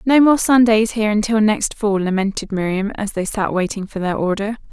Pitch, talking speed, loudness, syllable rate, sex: 210 Hz, 205 wpm, -18 LUFS, 5.4 syllables/s, female